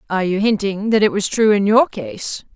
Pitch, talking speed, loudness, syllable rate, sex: 210 Hz, 235 wpm, -17 LUFS, 5.2 syllables/s, female